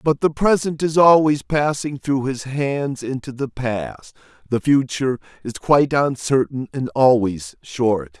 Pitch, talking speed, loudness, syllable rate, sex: 135 Hz, 145 wpm, -19 LUFS, 4.1 syllables/s, male